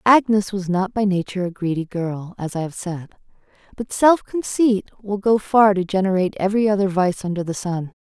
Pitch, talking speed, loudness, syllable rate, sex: 195 Hz, 195 wpm, -20 LUFS, 5.3 syllables/s, female